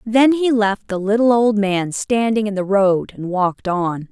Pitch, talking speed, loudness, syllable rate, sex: 205 Hz, 205 wpm, -17 LUFS, 4.3 syllables/s, female